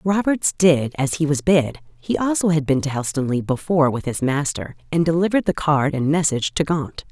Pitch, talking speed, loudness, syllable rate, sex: 155 Hz, 185 wpm, -20 LUFS, 5.4 syllables/s, female